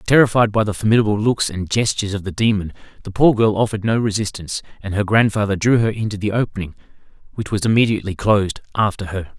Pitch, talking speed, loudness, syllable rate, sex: 105 Hz, 190 wpm, -18 LUFS, 6.7 syllables/s, male